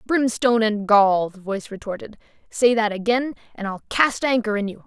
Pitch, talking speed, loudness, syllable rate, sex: 220 Hz, 185 wpm, -21 LUFS, 5.3 syllables/s, female